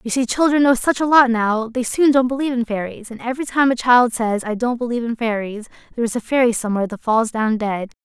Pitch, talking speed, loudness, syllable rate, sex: 240 Hz, 255 wpm, -18 LUFS, 6.3 syllables/s, female